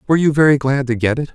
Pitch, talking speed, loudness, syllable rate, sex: 140 Hz, 310 wpm, -15 LUFS, 7.6 syllables/s, male